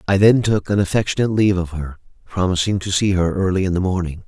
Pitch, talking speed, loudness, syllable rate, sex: 95 Hz, 225 wpm, -18 LUFS, 6.5 syllables/s, male